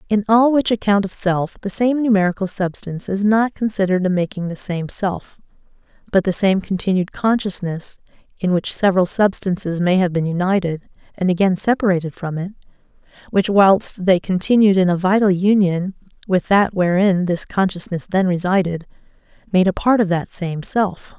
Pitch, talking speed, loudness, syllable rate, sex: 190 Hz, 165 wpm, -18 LUFS, 5.1 syllables/s, female